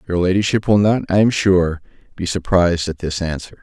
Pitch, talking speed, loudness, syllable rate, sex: 90 Hz, 200 wpm, -17 LUFS, 5.6 syllables/s, male